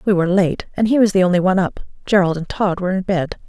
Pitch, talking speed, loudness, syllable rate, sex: 185 Hz, 275 wpm, -17 LUFS, 6.9 syllables/s, female